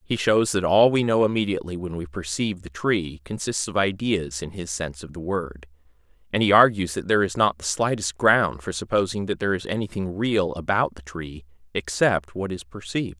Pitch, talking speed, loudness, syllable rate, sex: 95 Hz, 205 wpm, -23 LUFS, 5.4 syllables/s, male